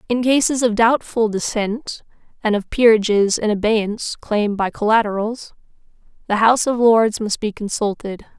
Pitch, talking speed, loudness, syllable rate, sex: 220 Hz, 145 wpm, -18 LUFS, 4.9 syllables/s, female